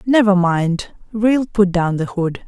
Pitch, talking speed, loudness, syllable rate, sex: 195 Hz, 170 wpm, -17 LUFS, 3.7 syllables/s, female